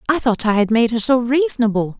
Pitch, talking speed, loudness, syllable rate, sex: 230 Hz, 240 wpm, -16 LUFS, 6.2 syllables/s, female